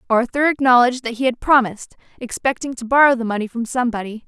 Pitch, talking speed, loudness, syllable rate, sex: 245 Hz, 180 wpm, -18 LUFS, 6.8 syllables/s, female